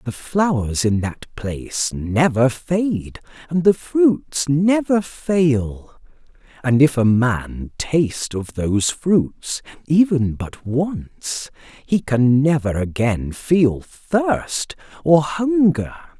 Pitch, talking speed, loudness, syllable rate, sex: 140 Hz, 115 wpm, -19 LUFS, 2.9 syllables/s, male